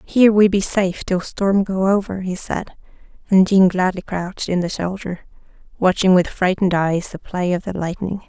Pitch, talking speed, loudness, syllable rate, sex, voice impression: 190 Hz, 190 wpm, -18 LUFS, 5.1 syllables/s, female, very feminine, young, slightly adult-like, thin, slightly relaxed, weak, slightly dark, hard, slightly muffled, fluent, slightly raspy, cute, very intellectual, slightly refreshing, very sincere, very calm, friendly, reassuring, very unique, elegant, wild, very sweet, very kind, very modest, light